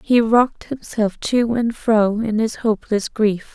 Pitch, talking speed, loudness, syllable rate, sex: 220 Hz, 170 wpm, -19 LUFS, 4.1 syllables/s, female